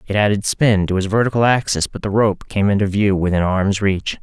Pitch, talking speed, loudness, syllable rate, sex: 100 Hz, 225 wpm, -17 LUFS, 5.4 syllables/s, male